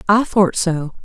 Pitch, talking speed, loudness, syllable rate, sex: 185 Hz, 175 wpm, -16 LUFS, 3.7 syllables/s, female